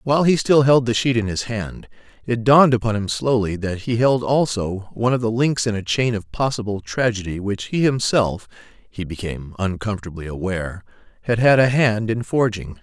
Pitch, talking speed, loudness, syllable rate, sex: 110 Hz, 190 wpm, -20 LUFS, 5.3 syllables/s, male